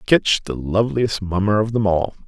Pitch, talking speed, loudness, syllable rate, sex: 100 Hz, 185 wpm, -19 LUFS, 5.0 syllables/s, male